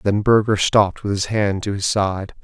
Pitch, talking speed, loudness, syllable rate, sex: 100 Hz, 220 wpm, -18 LUFS, 4.8 syllables/s, male